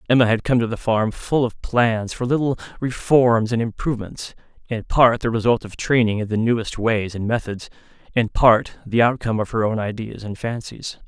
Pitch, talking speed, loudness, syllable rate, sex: 115 Hz, 195 wpm, -20 LUFS, 5.1 syllables/s, male